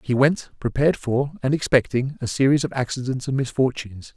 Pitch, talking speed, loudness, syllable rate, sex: 130 Hz, 175 wpm, -22 LUFS, 5.7 syllables/s, male